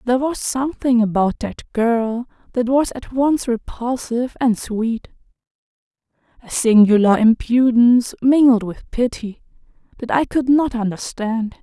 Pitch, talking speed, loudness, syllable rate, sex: 240 Hz, 125 wpm, -18 LUFS, 4.4 syllables/s, female